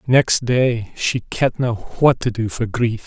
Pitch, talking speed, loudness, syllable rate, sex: 120 Hz, 175 wpm, -19 LUFS, 3.6 syllables/s, male